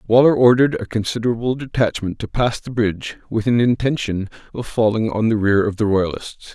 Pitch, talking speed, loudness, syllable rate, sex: 115 Hz, 185 wpm, -18 LUFS, 5.5 syllables/s, male